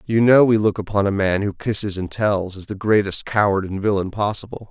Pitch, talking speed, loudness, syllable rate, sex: 100 Hz, 230 wpm, -19 LUFS, 5.4 syllables/s, male